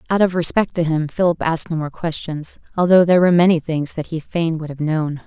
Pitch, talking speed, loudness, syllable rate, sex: 165 Hz, 240 wpm, -18 LUFS, 6.0 syllables/s, female